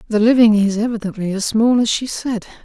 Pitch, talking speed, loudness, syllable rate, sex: 220 Hz, 205 wpm, -16 LUFS, 5.7 syllables/s, female